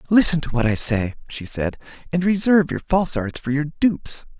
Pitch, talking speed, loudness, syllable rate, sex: 150 Hz, 205 wpm, -20 LUFS, 5.5 syllables/s, male